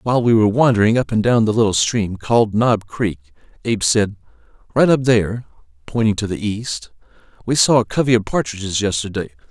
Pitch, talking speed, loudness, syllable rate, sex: 110 Hz, 170 wpm, -17 LUFS, 6.0 syllables/s, male